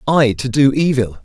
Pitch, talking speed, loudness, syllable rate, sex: 130 Hz, 195 wpm, -15 LUFS, 4.8 syllables/s, male